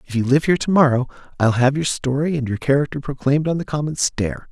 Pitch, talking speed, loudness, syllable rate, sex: 140 Hz, 225 wpm, -19 LUFS, 6.3 syllables/s, male